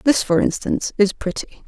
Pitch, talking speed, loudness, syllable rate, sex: 205 Hz, 180 wpm, -20 LUFS, 5.3 syllables/s, female